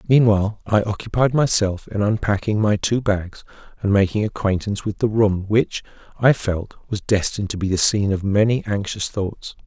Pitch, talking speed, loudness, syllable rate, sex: 105 Hz, 175 wpm, -20 LUFS, 5.2 syllables/s, male